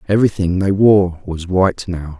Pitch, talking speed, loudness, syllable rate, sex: 95 Hz, 165 wpm, -15 LUFS, 5.1 syllables/s, male